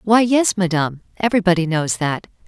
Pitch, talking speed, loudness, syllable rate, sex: 185 Hz, 145 wpm, -18 LUFS, 5.8 syllables/s, female